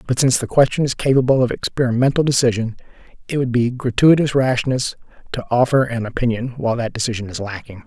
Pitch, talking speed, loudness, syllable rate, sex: 125 Hz, 175 wpm, -18 LUFS, 6.3 syllables/s, male